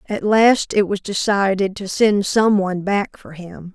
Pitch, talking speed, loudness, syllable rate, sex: 200 Hz, 190 wpm, -17 LUFS, 4.2 syllables/s, female